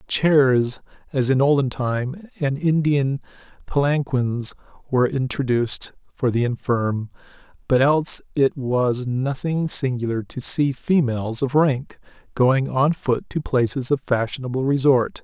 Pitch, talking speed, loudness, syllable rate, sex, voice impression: 135 Hz, 125 wpm, -21 LUFS, 4.1 syllables/s, male, masculine, adult-like, tensed, hard, slightly fluent, cool, intellectual, friendly, reassuring, wild, kind, slightly modest